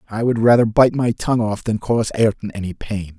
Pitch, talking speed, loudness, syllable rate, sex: 110 Hz, 225 wpm, -18 LUFS, 5.8 syllables/s, male